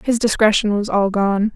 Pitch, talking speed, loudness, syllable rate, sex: 210 Hz, 195 wpm, -17 LUFS, 4.8 syllables/s, female